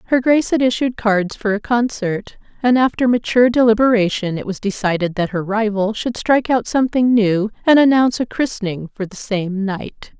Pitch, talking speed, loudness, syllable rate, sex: 220 Hz, 180 wpm, -17 LUFS, 5.4 syllables/s, female